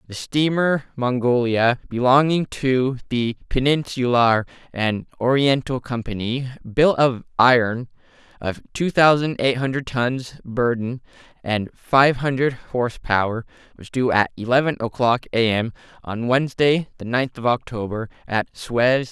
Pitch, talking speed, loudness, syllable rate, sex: 125 Hz, 120 wpm, -20 LUFS, 4.2 syllables/s, male